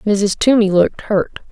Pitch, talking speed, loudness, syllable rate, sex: 205 Hz, 160 wpm, -15 LUFS, 4.4 syllables/s, female